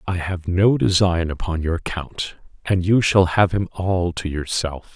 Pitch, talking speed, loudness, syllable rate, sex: 90 Hz, 180 wpm, -20 LUFS, 3.9 syllables/s, male